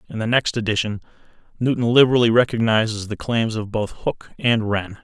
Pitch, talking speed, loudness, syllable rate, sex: 110 Hz, 165 wpm, -20 LUFS, 5.7 syllables/s, male